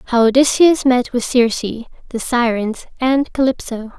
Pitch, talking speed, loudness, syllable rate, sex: 245 Hz, 135 wpm, -16 LUFS, 4.3 syllables/s, female